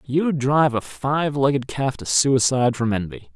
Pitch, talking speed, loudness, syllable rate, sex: 130 Hz, 180 wpm, -20 LUFS, 4.7 syllables/s, male